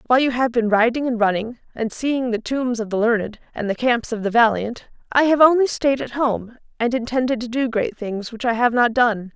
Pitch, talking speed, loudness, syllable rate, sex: 240 Hz, 235 wpm, -20 LUFS, 5.3 syllables/s, female